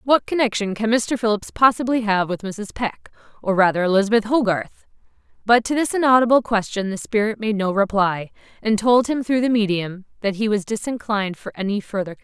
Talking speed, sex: 185 wpm, female